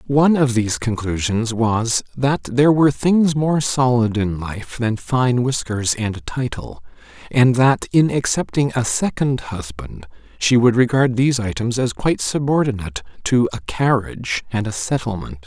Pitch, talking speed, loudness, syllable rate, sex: 120 Hz, 155 wpm, -19 LUFS, 4.7 syllables/s, male